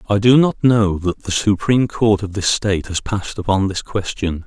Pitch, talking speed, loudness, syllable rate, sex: 100 Hz, 215 wpm, -17 LUFS, 5.2 syllables/s, male